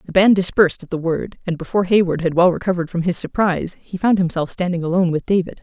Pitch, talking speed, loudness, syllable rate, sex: 180 Hz, 235 wpm, -18 LUFS, 6.9 syllables/s, female